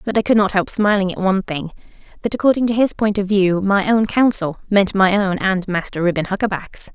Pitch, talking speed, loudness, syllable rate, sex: 195 Hz, 225 wpm, -17 LUFS, 5.6 syllables/s, female